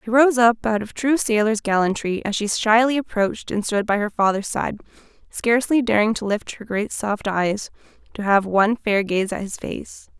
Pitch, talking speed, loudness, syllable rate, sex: 215 Hz, 200 wpm, -20 LUFS, 5.0 syllables/s, female